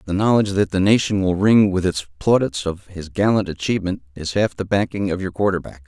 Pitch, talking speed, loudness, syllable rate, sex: 95 Hz, 225 wpm, -19 LUFS, 5.9 syllables/s, male